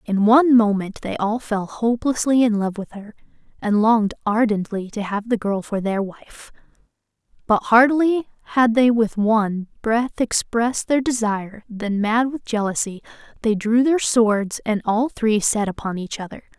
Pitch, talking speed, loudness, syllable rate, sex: 220 Hz, 165 wpm, -20 LUFS, 4.6 syllables/s, female